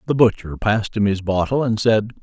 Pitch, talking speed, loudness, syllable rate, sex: 110 Hz, 215 wpm, -19 LUFS, 5.6 syllables/s, male